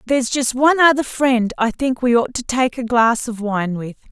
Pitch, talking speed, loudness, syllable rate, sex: 245 Hz, 235 wpm, -17 LUFS, 5.0 syllables/s, female